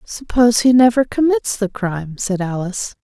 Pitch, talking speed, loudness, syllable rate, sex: 220 Hz, 160 wpm, -16 LUFS, 5.2 syllables/s, female